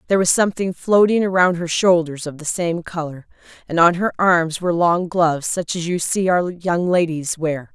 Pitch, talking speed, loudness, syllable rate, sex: 170 Hz, 200 wpm, -18 LUFS, 4.9 syllables/s, female